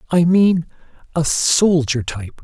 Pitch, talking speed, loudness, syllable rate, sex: 155 Hz, 125 wpm, -17 LUFS, 4.0 syllables/s, male